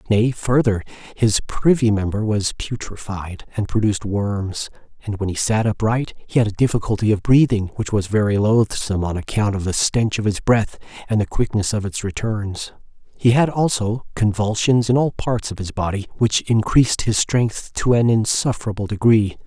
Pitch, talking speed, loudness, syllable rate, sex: 105 Hz, 175 wpm, -19 LUFS, 5.0 syllables/s, male